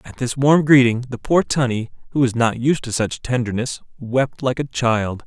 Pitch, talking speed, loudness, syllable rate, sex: 125 Hz, 205 wpm, -19 LUFS, 4.7 syllables/s, male